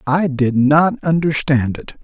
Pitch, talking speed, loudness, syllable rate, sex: 150 Hz, 145 wpm, -16 LUFS, 3.7 syllables/s, male